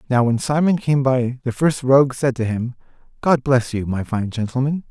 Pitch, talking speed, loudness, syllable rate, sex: 130 Hz, 210 wpm, -19 LUFS, 5.0 syllables/s, male